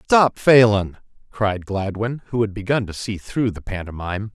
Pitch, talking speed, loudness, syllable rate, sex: 105 Hz, 165 wpm, -20 LUFS, 4.6 syllables/s, male